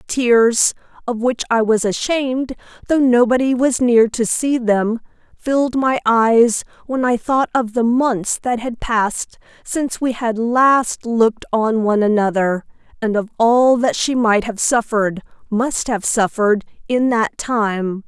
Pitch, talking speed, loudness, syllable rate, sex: 235 Hz, 150 wpm, -17 LUFS, 4.1 syllables/s, female